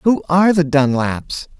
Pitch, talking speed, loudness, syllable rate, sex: 155 Hz, 150 wpm, -16 LUFS, 4.4 syllables/s, male